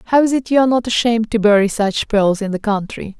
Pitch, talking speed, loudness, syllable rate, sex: 220 Hz, 245 wpm, -16 LUFS, 5.7 syllables/s, female